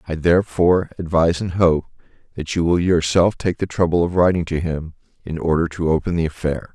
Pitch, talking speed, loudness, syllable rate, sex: 85 Hz, 195 wpm, -19 LUFS, 5.8 syllables/s, male